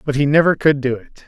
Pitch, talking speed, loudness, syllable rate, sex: 140 Hz, 280 wpm, -16 LUFS, 6.0 syllables/s, male